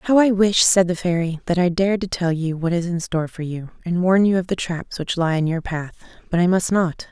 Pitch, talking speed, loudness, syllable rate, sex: 175 Hz, 280 wpm, -20 LUFS, 5.6 syllables/s, female